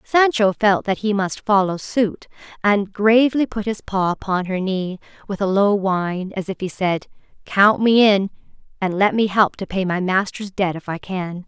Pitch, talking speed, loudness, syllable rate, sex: 195 Hz, 200 wpm, -19 LUFS, 4.6 syllables/s, female